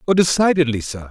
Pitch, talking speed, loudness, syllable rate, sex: 145 Hz, 165 wpm, -17 LUFS, 6.3 syllables/s, male